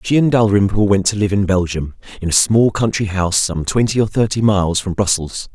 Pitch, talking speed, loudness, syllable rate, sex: 100 Hz, 215 wpm, -16 LUFS, 5.6 syllables/s, male